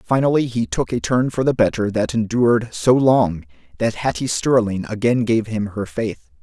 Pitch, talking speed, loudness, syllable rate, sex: 115 Hz, 185 wpm, -19 LUFS, 4.8 syllables/s, male